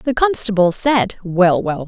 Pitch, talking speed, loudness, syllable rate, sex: 205 Hz, 130 wpm, -16 LUFS, 3.4 syllables/s, female